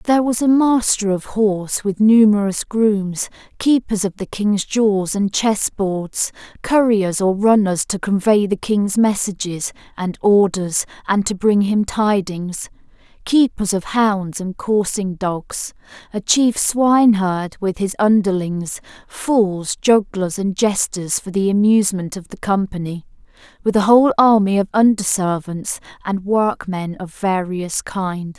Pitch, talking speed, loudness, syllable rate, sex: 200 Hz, 135 wpm, -18 LUFS, 3.9 syllables/s, female